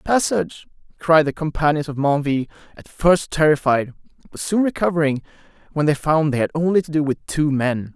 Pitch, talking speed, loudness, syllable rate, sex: 155 Hz, 175 wpm, -19 LUFS, 5.7 syllables/s, male